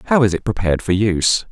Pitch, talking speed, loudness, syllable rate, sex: 105 Hz, 235 wpm, -17 LUFS, 7.0 syllables/s, male